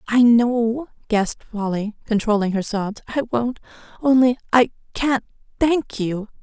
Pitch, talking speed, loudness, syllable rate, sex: 230 Hz, 110 wpm, -20 LUFS, 4.2 syllables/s, female